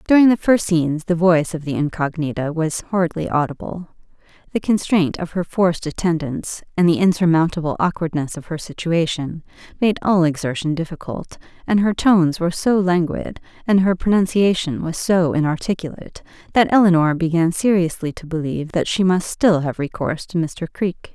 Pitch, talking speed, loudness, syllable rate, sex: 170 Hz, 160 wpm, -19 LUFS, 5.4 syllables/s, female